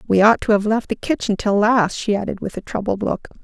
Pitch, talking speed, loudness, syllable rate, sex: 210 Hz, 260 wpm, -19 LUFS, 5.7 syllables/s, female